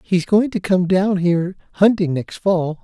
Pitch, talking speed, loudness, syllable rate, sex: 185 Hz, 190 wpm, -18 LUFS, 4.4 syllables/s, male